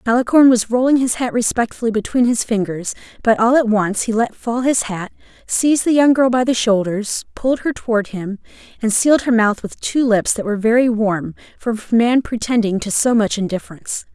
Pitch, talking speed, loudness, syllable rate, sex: 230 Hz, 205 wpm, -17 LUFS, 5.6 syllables/s, female